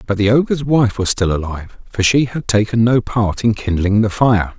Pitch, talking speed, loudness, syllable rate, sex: 110 Hz, 220 wpm, -16 LUFS, 5.1 syllables/s, male